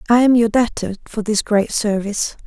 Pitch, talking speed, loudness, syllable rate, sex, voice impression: 220 Hz, 195 wpm, -18 LUFS, 5.3 syllables/s, female, very feminine, adult-like, middle-aged, thin, tensed, slightly weak, slightly dark, soft, clear, slightly raspy, slightly cute, intellectual, very refreshing, slightly sincere, calm, friendly, reassuring, slightly unique, elegant, sweet, slightly lively, very kind, very modest, light